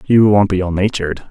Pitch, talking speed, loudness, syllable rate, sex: 95 Hz, 230 wpm, -14 LUFS, 5.8 syllables/s, male